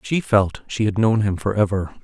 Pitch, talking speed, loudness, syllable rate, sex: 105 Hz, 235 wpm, -20 LUFS, 4.8 syllables/s, male